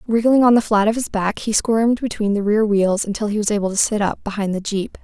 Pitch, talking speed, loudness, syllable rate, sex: 210 Hz, 275 wpm, -18 LUFS, 6.0 syllables/s, female